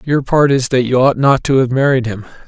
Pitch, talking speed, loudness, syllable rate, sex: 130 Hz, 265 wpm, -13 LUFS, 5.5 syllables/s, male